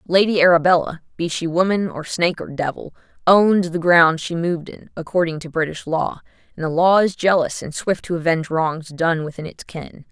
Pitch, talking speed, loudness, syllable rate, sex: 170 Hz, 195 wpm, -19 LUFS, 5.4 syllables/s, female